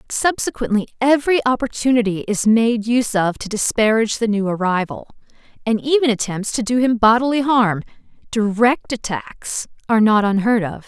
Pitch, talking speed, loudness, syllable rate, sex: 225 Hz, 145 wpm, -18 LUFS, 5.3 syllables/s, female